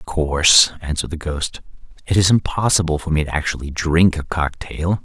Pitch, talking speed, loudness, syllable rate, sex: 80 Hz, 180 wpm, -18 LUFS, 5.4 syllables/s, male